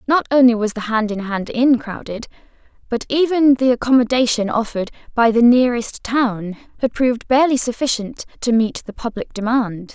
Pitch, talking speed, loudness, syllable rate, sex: 240 Hz, 165 wpm, -18 LUFS, 5.4 syllables/s, female